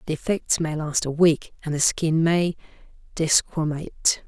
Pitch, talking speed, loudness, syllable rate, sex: 160 Hz, 155 wpm, -22 LUFS, 4.9 syllables/s, female